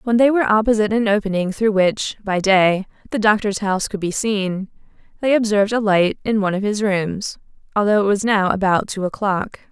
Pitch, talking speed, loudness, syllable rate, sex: 205 Hz, 200 wpm, -18 LUFS, 5.5 syllables/s, female